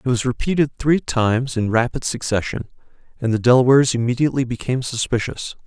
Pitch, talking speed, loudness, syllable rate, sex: 125 Hz, 150 wpm, -19 LUFS, 6.1 syllables/s, male